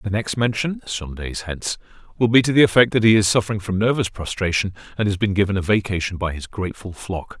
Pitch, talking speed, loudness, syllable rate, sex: 100 Hz, 225 wpm, -20 LUFS, 6.2 syllables/s, male